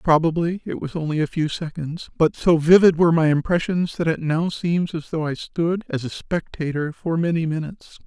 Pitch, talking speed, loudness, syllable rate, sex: 160 Hz, 200 wpm, -21 LUFS, 5.2 syllables/s, male